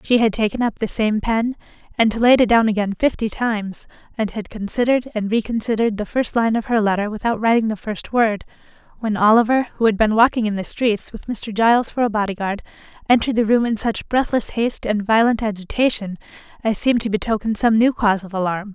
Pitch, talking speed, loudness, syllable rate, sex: 220 Hz, 210 wpm, -19 LUFS, 5.9 syllables/s, female